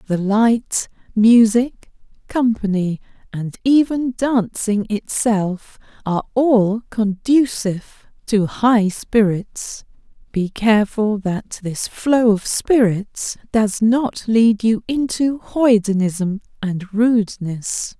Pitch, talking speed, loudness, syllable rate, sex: 220 Hz, 95 wpm, -18 LUFS, 3.1 syllables/s, female